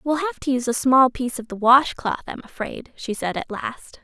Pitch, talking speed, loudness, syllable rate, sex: 255 Hz, 255 wpm, -21 LUFS, 5.3 syllables/s, female